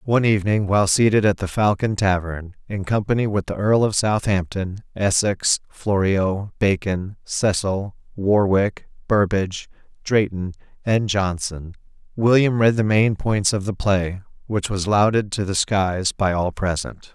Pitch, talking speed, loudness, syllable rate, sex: 100 Hz, 145 wpm, -20 LUFS, 4.3 syllables/s, male